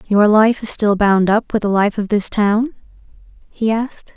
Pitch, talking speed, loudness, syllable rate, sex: 215 Hz, 200 wpm, -15 LUFS, 4.6 syllables/s, female